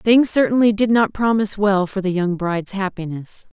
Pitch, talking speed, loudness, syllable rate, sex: 200 Hz, 185 wpm, -18 LUFS, 5.2 syllables/s, female